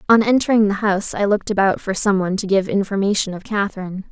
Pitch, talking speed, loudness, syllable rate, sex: 200 Hz, 220 wpm, -18 LUFS, 7.0 syllables/s, female